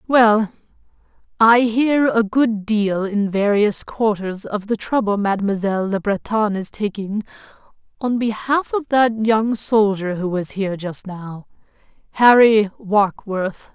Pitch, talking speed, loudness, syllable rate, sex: 210 Hz, 120 wpm, -18 LUFS, 3.9 syllables/s, female